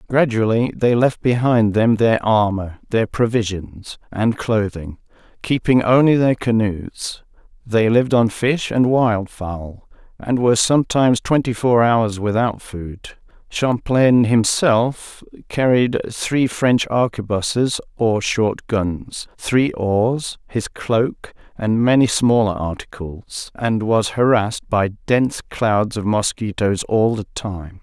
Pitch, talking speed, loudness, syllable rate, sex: 115 Hz, 125 wpm, -18 LUFS, 3.6 syllables/s, male